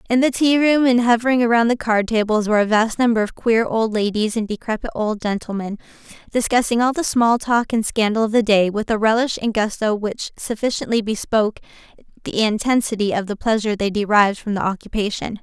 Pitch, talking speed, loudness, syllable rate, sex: 220 Hz, 195 wpm, -19 LUFS, 5.8 syllables/s, female